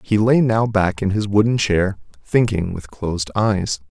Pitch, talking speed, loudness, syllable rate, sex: 100 Hz, 185 wpm, -19 LUFS, 4.4 syllables/s, male